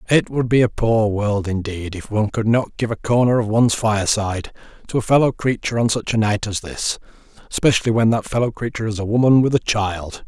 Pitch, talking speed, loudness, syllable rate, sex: 110 Hz, 220 wpm, -19 LUFS, 6.0 syllables/s, male